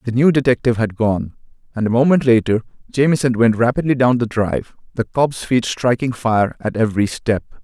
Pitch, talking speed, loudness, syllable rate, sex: 120 Hz, 180 wpm, -17 LUFS, 5.5 syllables/s, male